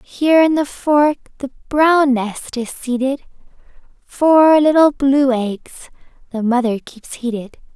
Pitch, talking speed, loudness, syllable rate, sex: 270 Hz, 130 wpm, -15 LUFS, 3.7 syllables/s, female